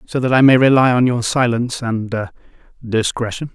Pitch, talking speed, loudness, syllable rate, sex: 120 Hz, 150 wpm, -16 LUFS, 5.1 syllables/s, male